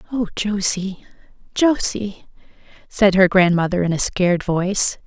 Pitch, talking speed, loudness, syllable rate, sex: 195 Hz, 120 wpm, -18 LUFS, 4.6 syllables/s, female